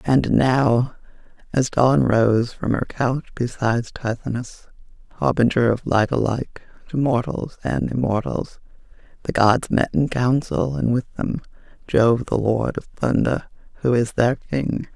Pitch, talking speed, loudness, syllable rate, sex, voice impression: 120 Hz, 130 wpm, -21 LUFS, 4.2 syllables/s, female, feminine, adult-like, weak, slightly dark, soft, very raspy, slightly nasal, intellectual, calm, reassuring, modest